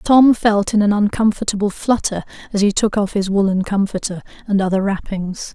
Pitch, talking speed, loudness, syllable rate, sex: 205 Hz, 175 wpm, -17 LUFS, 5.2 syllables/s, female